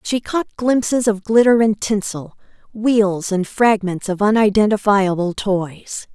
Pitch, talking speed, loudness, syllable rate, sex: 210 Hz, 125 wpm, -17 LUFS, 3.9 syllables/s, female